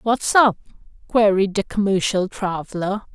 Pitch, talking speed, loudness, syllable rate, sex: 200 Hz, 115 wpm, -19 LUFS, 4.4 syllables/s, female